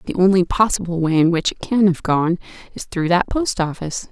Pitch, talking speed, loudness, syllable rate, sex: 180 Hz, 220 wpm, -18 LUFS, 5.6 syllables/s, female